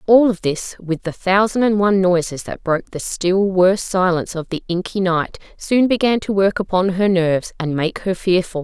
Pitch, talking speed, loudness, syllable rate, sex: 185 Hz, 210 wpm, -18 LUFS, 5.1 syllables/s, female